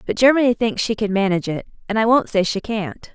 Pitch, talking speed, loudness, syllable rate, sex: 215 Hz, 250 wpm, -19 LUFS, 6.1 syllables/s, female